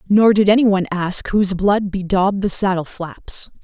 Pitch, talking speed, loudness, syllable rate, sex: 195 Hz, 180 wpm, -17 LUFS, 5.1 syllables/s, female